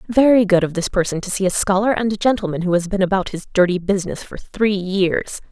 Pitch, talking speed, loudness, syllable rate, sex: 195 Hz, 240 wpm, -18 LUFS, 5.9 syllables/s, female